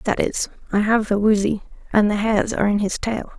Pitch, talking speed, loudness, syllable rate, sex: 210 Hz, 230 wpm, -20 LUFS, 5.5 syllables/s, female